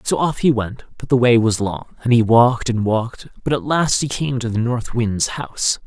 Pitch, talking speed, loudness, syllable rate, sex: 120 Hz, 245 wpm, -18 LUFS, 4.9 syllables/s, male